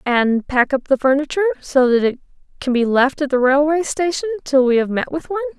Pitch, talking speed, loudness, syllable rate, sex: 280 Hz, 225 wpm, -17 LUFS, 5.9 syllables/s, female